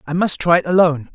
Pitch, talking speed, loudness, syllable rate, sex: 165 Hz, 260 wpm, -16 LUFS, 7.0 syllables/s, male